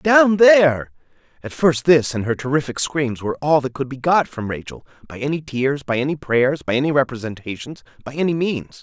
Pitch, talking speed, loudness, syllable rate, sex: 140 Hz, 195 wpm, -19 LUFS, 5.4 syllables/s, male